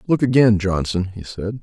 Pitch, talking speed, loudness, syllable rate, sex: 105 Hz, 185 wpm, -19 LUFS, 4.8 syllables/s, male